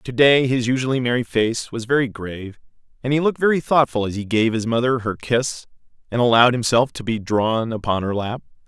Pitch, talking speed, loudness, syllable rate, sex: 120 Hz, 200 wpm, -20 LUFS, 5.7 syllables/s, male